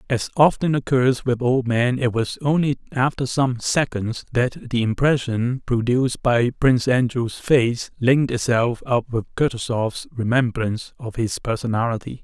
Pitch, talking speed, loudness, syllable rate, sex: 125 Hz, 140 wpm, -21 LUFS, 4.5 syllables/s, male